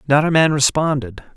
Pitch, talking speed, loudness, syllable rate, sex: 145 Hz, 175 wpm, -16 LUFS, 5.4 syllables/s, male